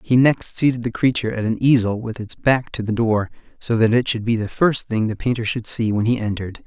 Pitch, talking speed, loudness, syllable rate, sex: 115 Hz, 260 wpm, -20 LUFS, 5.7 syllables/s, male